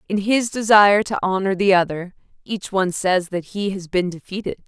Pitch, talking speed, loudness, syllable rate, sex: 195 Hz, 195 wpm, -19 LUFS, 5.3 syllables/s, female